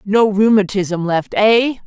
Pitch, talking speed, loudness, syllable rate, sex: 205 Hz, 130 wpm, -15 LUFS, 3.6 syllables/s, female